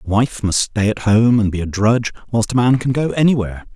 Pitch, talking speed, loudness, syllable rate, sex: 110 Hz, 255 wpm, -17 LUFS, 6.0 syllables/s, male